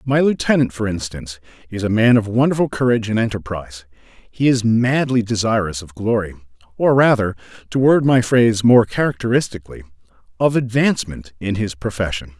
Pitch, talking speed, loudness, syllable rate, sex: 110 Hz, 150 wpm, -17 LUFS, 5.7 syllables/s, male